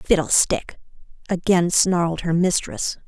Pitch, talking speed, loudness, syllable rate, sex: 170 Hz, 100 wpm, -20 LUFS, 4.1 syllables/s, female